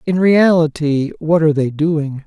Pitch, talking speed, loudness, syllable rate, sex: 160 Hz, 160 wpm, -15 LUFS, 4.4 syllables/s, male